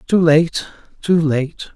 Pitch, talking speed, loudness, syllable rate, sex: 160 Hz, 105 wpm, -17 LUFS, 3.3 syllables/s, male